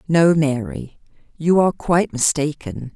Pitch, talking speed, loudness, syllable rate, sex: 150 Hz, 120 wpm, -18 LUFS, 4.5 syllables/s, female